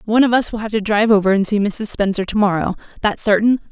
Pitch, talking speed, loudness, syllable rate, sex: 210 Hz, 240 wpm, -17 LUFS, 6.8 syllables/s, female